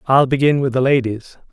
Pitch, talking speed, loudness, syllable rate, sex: 130 Hz, 195 wpm, -16 LUFS, 5.4 syllables/s, male